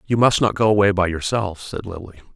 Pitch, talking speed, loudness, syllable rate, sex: 100 Hz, 230 wpm, -19 LUFS, 5.1 syllables/s, male